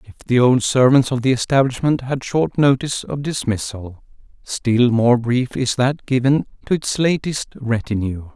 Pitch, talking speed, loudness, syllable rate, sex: 125 Hz, 160 wpm, -18 LUFS, 4.5 syllables/s, male